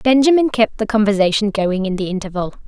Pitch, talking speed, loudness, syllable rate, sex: 215 Hz, 180 wpm, -17 LUFS, 6.1 syllables/s, female